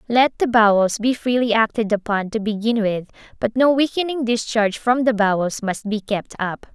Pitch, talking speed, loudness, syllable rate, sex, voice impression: 225 Hz, 185 wpm, -19 LUFS, 5.0 syllables/s, female, feminine, young, tensed, powerful, bright, slightly soft, slightly halting, cute, slightly refreshing, friendly, slightly sweet, lively